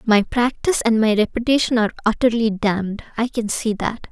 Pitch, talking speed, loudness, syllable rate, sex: 225 Hz, 160 wpm, -19 LUFS, 5.7 syllables/s, female